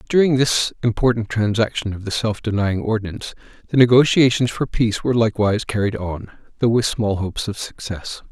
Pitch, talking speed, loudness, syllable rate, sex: 110 Hz, 165 wpm, -19 LUFS, 5.9 syllables/s, male